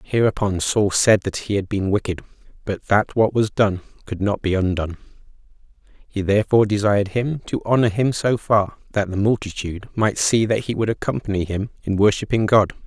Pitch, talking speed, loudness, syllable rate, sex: 105 Hz, 180 wpm, -20 LUFS, 5.4 syllables/s, male